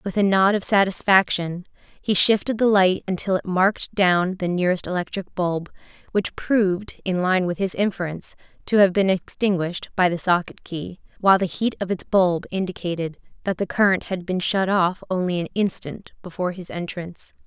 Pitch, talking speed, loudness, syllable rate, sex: 185 Hz, 180 wpm, -22 LUFS, 5.3 syllables/s, female